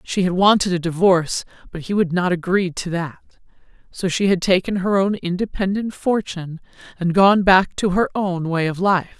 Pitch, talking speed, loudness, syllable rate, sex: 185 Hz, 190 wpm, -19 LUFS, 4.9 syllables/s, female